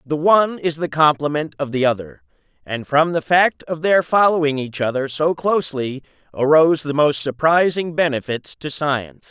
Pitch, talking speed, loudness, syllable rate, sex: 150 Hz, 170 wpm, -18 LUFS, 5.0 syllables/s, male